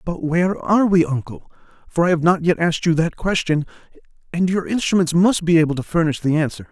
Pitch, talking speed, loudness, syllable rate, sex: 170 Hz, 215 wpm, -18 LUFS, 6.1 syllables/s, male